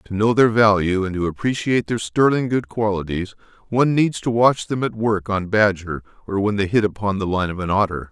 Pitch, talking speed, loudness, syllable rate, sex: 105 Hz, 220 wpm, -19 LUFS, 5.5 syllables/s, male